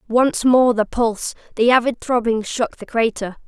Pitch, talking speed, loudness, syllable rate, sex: 235 Hz, 175 wpm, -18 LUFS, 4.7 syllables/s, female